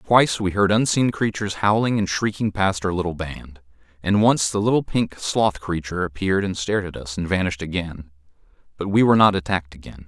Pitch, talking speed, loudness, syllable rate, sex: 95 Hz, 195 wpm, -21 LUFS, 6.0 syllables/s, male